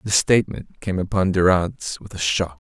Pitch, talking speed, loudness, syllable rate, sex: 90 Hz, 180 wpm, -21 LUFS, 5.2 syllables/s, male